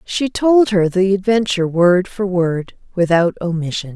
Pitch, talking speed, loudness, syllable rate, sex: 190 Hz, 150 wpm, -16 LUFS, 4.4 syllables/s, female